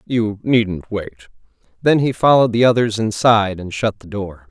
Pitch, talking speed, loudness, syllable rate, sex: 110 Hz, 175 wpm, -17 LUFS, 5.0 syllables/s, male